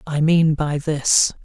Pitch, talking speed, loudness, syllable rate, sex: 150 Hz, 165 wpm, -18 LUFS, 3.2 syllables/s, male